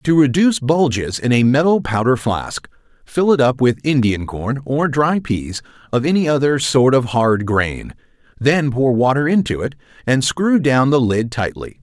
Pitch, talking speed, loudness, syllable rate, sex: 135 Hz, 180 wpm, -16 LUFS, 4.4 syllables/s, male